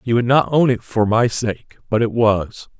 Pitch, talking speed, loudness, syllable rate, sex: 115 Hz, 235 wpm, -17 LUFS, 4.4 syllables/s, male